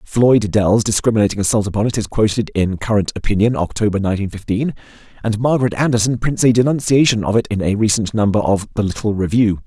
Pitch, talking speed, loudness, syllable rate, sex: 110 Hz, 185 wpm, -17 LUFS, 6.3 syllables/s, male